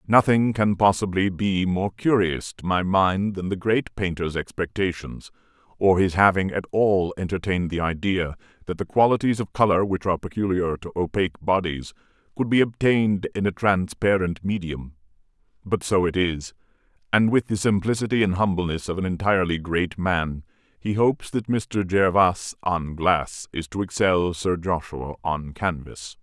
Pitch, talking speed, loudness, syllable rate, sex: 95 Hz, 160 wpm, -23 LUFS, 4.8 syllables/s, male